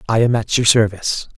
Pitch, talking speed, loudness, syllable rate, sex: 110 Hz, 215 wpm, -16 LUFS, 6.2 syllables/s, male